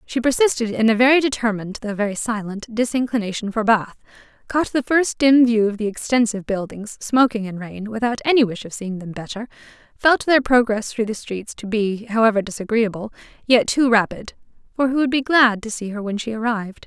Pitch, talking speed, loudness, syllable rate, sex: 225 Hz, 195 wpm, -20 LUFS, 5.6 syllables/s, female